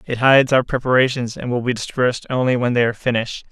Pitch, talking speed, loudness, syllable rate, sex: 125 Hz, 220 wpm, -18 LUFS, 6.9 syllables/s, male